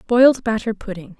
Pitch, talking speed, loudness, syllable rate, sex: 220 Hz, 150 wpm, -17 LUFS, 5.8 syllables/s, female